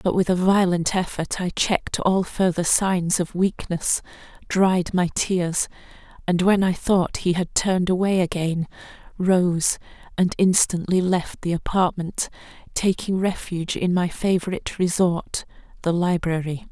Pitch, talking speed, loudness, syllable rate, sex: 180 Hz, 135 wpm, -22 LUFS, 4.3 syllables/s, female